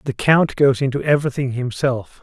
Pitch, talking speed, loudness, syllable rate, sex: 135 Hz, 160 wpm, -18 LUFS, 5.3 syllables/s, male